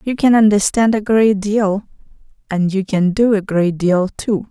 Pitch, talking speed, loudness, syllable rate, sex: 205 Hz, 185 wpm, -15 LUFS, 4.2 syllables/s, female